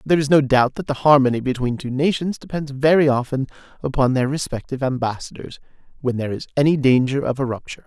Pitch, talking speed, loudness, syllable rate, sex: 135 Hz, 190 wpm, -20 LUFS, 6.5 syllables/s, male